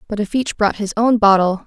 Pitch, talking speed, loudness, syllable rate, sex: 210 Hz, 255 wpm, -16 LUFS, 5.4 syllables/s, female